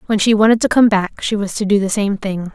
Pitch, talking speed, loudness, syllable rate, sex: 205 Hz, 305 wpm, -15 LUFS, 5.9 syllables/s, female